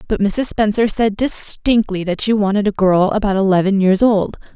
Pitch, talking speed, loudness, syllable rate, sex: 205 Hz, 185 wpm, -16 LUFS, 5.0 syllables/s, female